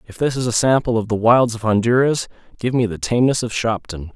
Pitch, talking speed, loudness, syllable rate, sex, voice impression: 115 Hz, 230 wpm, -18 LUFS, 5.9 syllables/s, male, masculine, adult-like, tensed, powerful, bright, clear, fluent, cool, intellectual, refreshing, friendly, lively, kind, slightly light